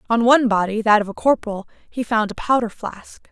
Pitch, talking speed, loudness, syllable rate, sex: 225 Hz, 215 wpm, -19 LUFS, 5.7 syllables/s, female